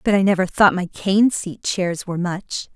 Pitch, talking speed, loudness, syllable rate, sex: 190 Hz, 220 wpm, -19 LUFS, 4.6 syllables/s, female